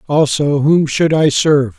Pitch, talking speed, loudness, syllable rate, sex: 145 Hz, 170 wpm, -13 LUFS, 4.4 syllables/s, male